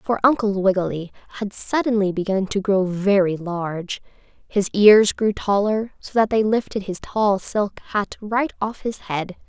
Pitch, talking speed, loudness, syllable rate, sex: 200 Hz, 165 wpm, -21 LUFS, 4.3 syllables/s, female